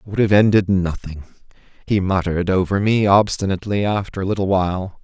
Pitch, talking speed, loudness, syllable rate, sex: 95 Hz, 155 wpm, -18 LUFS, 5.7 syllables/s, male